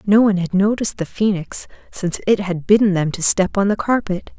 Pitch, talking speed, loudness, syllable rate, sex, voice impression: 195 Hz, 220 wpm, -18 LUFS, 5.9 syllables/s, female, feminine, adult-like, sincere, slightly calm, slightly friendly